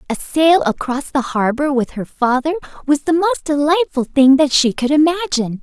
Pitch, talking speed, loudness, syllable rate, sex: 290 Hz, 180 wpm, -16 LUFS, 5.1 syllables/s, female